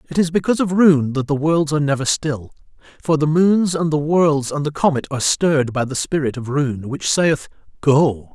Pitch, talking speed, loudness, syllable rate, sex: 150 Hz, 215 wpm, -18 LUFS, 5.2 syllables/s, male